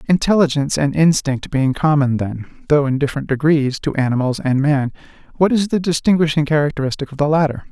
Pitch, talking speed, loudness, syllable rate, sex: 145 Hz, 170 wpm, -17 LUFS, 6.0 syllables/s, male